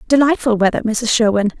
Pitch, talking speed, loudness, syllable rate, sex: 230 Hz, 150 wpm, -15 LUFS, 6.1 syllables/s, female